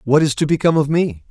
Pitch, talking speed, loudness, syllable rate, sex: 145 Hz, 275 wpm, -17 LUFS, 6.8 syllables/s, male